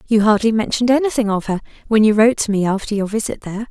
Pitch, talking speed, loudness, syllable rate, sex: 215 Hz, 245 wpm, -17 LUFS, 7.3 syllables/s, female